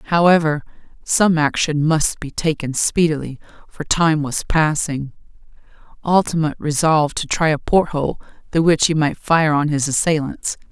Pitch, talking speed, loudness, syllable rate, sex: 155 Hz, 145 wpm, -18 LUFS, 4.6 syllables/s, female